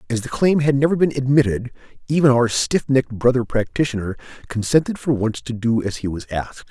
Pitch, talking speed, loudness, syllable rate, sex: 125 Hz, 195 wpm, -19 LUFS, 5.8 syllables/s, male